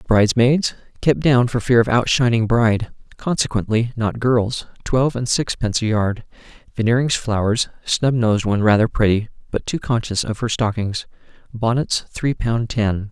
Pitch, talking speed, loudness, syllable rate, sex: 115 Hz, 150 wpm, -19 LUFS, 4.9 syllables/s, male